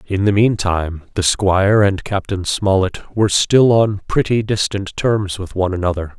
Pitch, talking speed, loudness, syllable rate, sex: 100 Hz, 165 wpm, -16 LUFS, 4.8 syllables/s, male